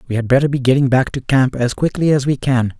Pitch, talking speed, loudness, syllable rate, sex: 130 Hz, 280 wpm, -16 LUFS, 6.1 syllables/s, male